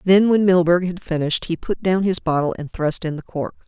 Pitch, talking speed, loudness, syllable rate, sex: 170 Hz, 245 wpm, -20 LUFS, 5.5 syllables/s, female